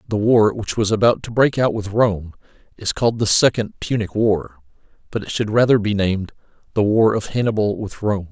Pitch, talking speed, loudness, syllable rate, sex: 105 Hz, 200 wpm, -19 LUFS, 5.3 syllables/s, male